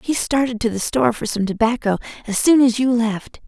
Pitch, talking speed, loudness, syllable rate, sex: 230 Hz, 225 wpm, -18 LUFS, 5.6 syllables/s, female